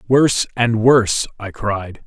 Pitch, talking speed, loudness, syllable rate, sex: 110 Hz, 145 wpm, -17 LUFS, 4.1 syllables/s, male